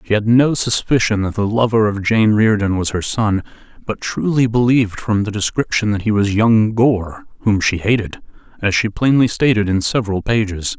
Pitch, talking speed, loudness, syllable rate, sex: 110 Hz, 185 wpm, -16 LUFS, 5.1 syllables/s, male